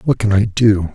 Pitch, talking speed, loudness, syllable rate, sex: 105 Hz, 255 wpm, -15 LUFS, 5.3 syllables/s, male